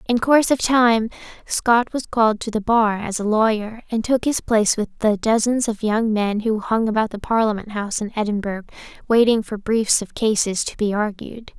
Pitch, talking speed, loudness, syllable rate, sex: 220 Hz, 200 wpm, -20 LUFS, 5.1 syllables/s, female